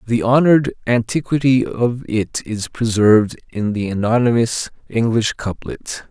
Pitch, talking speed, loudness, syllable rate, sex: 115 Hz, 120 wpm, -17 LUFS, 4.3 syllables/s, male